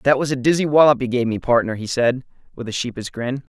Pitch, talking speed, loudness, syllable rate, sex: 125 Hz, 255 wpm, -19 LUFS, 6.2 syllables/s, male